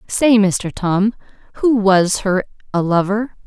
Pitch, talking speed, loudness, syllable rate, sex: 205 Hz, 140 wpm, -16 LUFS, 3.6 syllables/s, female